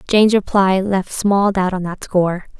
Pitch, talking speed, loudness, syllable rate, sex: 190 Hz, 185 wpm, -16 LUFS, 4.7 syllables/s, female